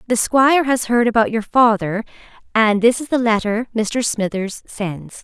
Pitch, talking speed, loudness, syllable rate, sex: 225 Hz, 170 wpm, -17 LUFS, 4.5 syllables/s, female